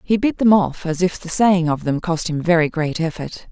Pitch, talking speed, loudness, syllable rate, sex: 170 Hz, 255 wpm, -18 LUFS, 5.0 syllables/s, female